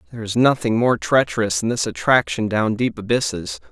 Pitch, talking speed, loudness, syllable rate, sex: 110 Hz, 180 wpm, -19 LUFS, 5.7 syllables/s, male